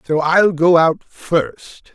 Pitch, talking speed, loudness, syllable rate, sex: 165 Hz, 155 wpm, -15 LUFS, 2.8 syllables/s, male